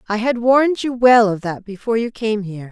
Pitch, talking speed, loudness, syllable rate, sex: 225 Hz, 245 wpm, -17 LUFS, 5.9 syllables/s, female